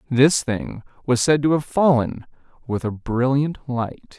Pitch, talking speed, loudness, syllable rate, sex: 130 Hz, 160 wpm, -21 LUFS, 3.9 syllables/s, male